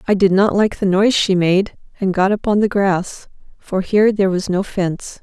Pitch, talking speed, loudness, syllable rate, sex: 195 Hz, 220 wpm, -16 LUFS, 5.2 syllables/s, female